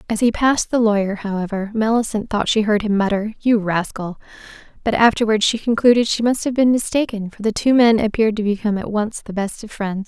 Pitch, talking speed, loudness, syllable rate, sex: 215 Hz, 215 wpm, -18 LUFS, 5.9 syllables/s, female